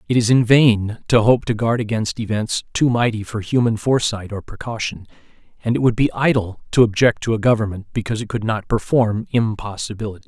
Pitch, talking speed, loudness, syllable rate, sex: 110 Hz, 195 wpm, -19 LUFS, 5.8 syllables/s, male